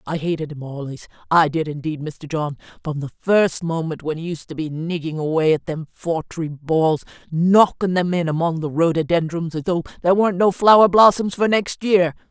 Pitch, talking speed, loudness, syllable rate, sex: 165 Hz, 195 wpm, -19 LUFS, 5.1 syllables/s, female